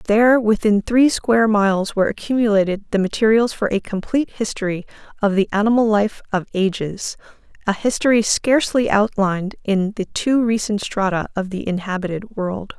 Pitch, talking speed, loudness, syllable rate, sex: 210 Hz, 150 wpm, -19 LUFS, 5.4 syllables/s, female